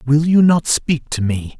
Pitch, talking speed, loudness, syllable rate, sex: 145 Hz, 225 wpm, -16 LUFS, 4.1 syllables/s, male